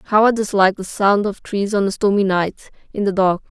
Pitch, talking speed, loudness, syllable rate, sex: 200 Hz, 235 wpm, -18 LUFS, 5.3 syllables/s, female